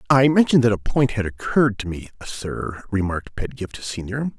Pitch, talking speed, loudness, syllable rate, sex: 115 Hz, 180 wpm, -22 LUFS, 5.4 syllables/s, male